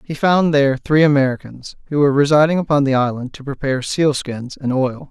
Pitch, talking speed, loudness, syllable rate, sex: 140 Hz, 190 wpm, -17 LUFS, 5.8 syllables/s, male